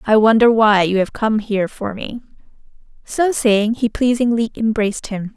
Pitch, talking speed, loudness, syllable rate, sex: 220 Hz, 170 wpm, -16 LUFS, 4.9 syllables/s, female